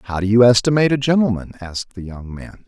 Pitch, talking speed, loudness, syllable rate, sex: 110 Hz, 225 wpm, -16 LUFS, 6.7 syllables/s, male